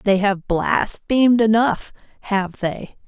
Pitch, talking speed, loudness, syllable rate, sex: 210 Hz, 115 wpm, -19 LUFS, 3.6 syllables/s, female